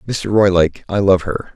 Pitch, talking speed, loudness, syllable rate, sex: 95 Hz, 195 wpm, -15 LUFS, 5.4 syllables/s, male